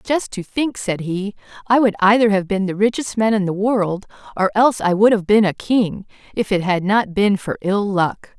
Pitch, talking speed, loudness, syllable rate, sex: 205 Hz, 230 wpm, -18 LUFS, 4.9 syllables/s, female